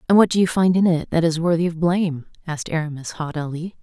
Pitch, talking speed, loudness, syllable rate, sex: 165 Hz, 235 wpm, -20 LUFS, 6.4 syllables/s, female